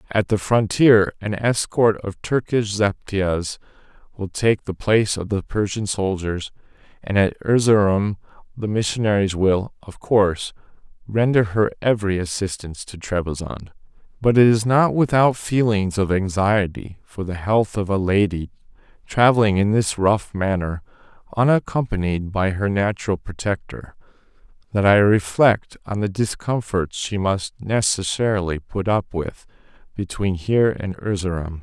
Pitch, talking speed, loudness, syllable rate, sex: 100 Hz, 135 wpm, -20 LUFS, 4.6 syllables/s, male